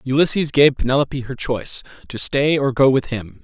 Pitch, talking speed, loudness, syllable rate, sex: 135 Hz, 190 wpm, -18 LUFS, 5.5 syllables/s, male